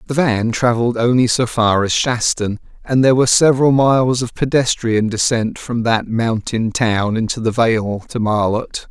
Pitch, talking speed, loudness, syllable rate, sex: 115 Hz, 170 wpm, -16 LUFS, 4.7 syllables/s, male